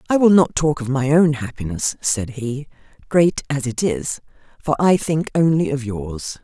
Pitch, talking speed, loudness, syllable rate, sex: 140 Hz, 185 wpm, -19 LUFS, 4.4 syllables/s, female